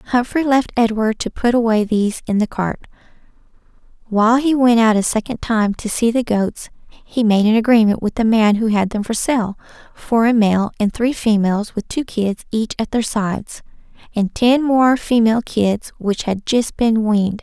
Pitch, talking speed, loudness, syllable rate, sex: 225 Hz, 195 wpm, -17 LUFS, 4.7 syllables/s, female